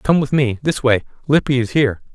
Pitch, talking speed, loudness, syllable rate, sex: 130 Hz, 170 wpm, -17 LUFS, 5.7 syllables/s, male